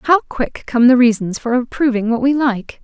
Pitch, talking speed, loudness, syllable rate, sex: 245 Hz, 210 wpm, -15 LUFS, 4.7 syllables/s, female